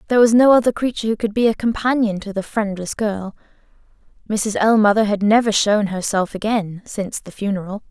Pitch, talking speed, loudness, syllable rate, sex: 210 Hz, 180 wpm, -18 LUFS, 5.9 syllables/s, female